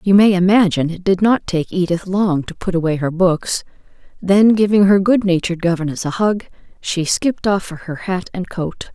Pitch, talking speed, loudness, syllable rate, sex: 185 Hz, 195 wpm, -17 LUFS, 5.2 syllables/s, female